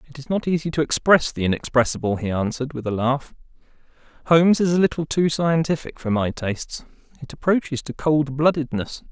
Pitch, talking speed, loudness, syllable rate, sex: 145 Hz, 170 wpm, -21 LUFS, 5.8 syllables/s, male